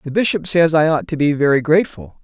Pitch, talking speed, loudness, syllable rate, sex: 155 Hz, 240 wpm, -16 LUFS, 6.2 syllables/s, male